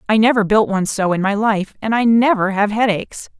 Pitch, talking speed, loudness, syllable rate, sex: 210 Hz, 230 wpm, -16 LUFS, 5.8 syllables/s, female